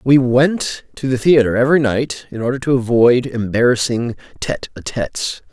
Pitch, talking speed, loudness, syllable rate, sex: 125 Hz, 165 wpm, -16 LUFS, 5.1 syllables/s, male